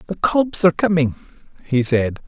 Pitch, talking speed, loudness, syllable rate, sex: 150 Hz, 160 wpm, -18 LUFS, 5.2 syllables/s, male